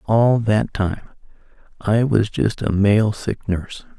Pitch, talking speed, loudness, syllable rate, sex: 105 Hz, 165 wpm, -19 LUFS, 4.0 syllables/s, male